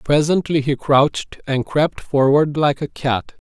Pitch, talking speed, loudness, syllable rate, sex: 145 Hz, 155 wpm, -18 LUFS, 4.0 syllables/s, male